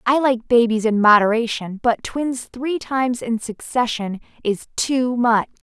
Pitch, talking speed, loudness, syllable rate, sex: 235 Hz, 145 wpm, -19 LUFS, 4.2 syllables/s, female